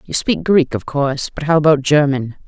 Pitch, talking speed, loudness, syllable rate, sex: 145 Hz, 220 wpm, -16 LUFS, 5.3 syllables/s, female